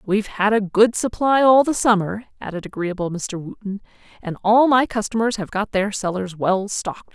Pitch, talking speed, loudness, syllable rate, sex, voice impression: 205 Hz, 195 wpm, -20 LUFS, 5.5 syllables/s, female, very feminine, very middle-aged, very thin, tensed, powerful, bright, slightly hard, very clear, fluent, raspy, slightly cool, intellectual, slightly sincere, slightly calm, slightly friendly, slightly reassuring, very unique, slightly elegant, slightly wild, slightly sweet, very lively, very strict, intense, very sharp, light